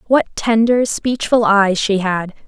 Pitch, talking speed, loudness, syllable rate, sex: 215 Hz, 145 wpm, -15 LUFS, 3.8 syllables/s, female